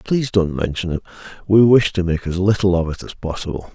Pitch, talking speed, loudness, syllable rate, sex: 95 Hz, 225 wpm, -18 LUFS, 6.0 syllables/s, male